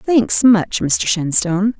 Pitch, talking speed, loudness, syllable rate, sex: 205 Hz, 135 wpm, -14 LUFS, 3.5 syllables/s, female